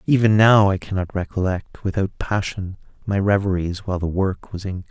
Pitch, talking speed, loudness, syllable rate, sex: 95 Hz, 170 wpm, -21 LUFS, 5.8 syllables/s, male